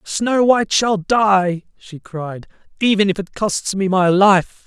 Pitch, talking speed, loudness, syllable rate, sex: 195 Hz, 165 wpm, -16 LUFS, 3.6 syllables/s, male